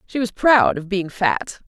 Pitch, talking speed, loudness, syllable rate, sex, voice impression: 210 Hz, 215 wpm, -19 LUFS, 4.0 syllables/s, female, feminine, adult-like, tensed, powerful, slightly hard, clear, fluent, intellectual, calm, elegant, lively, sharp